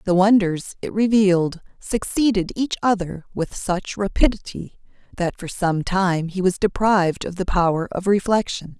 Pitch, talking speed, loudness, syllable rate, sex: 190 Hz, 150 wpm, -21 LUFS, 4.6 syllables/s, female